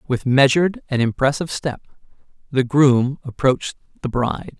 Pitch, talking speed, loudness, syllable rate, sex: 135 Hz, 130 wpm, -19 LUFS, 5.2 syllables/s, male